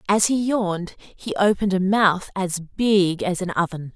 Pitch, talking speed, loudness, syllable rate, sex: 190 Hz, 180 wpm, -21 LUFS, 4.4 syllables/s, female